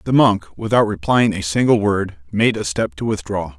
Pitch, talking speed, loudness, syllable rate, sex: 100 Hz, 200 wpm, -18 LUFS, 4.8 syllables/s, male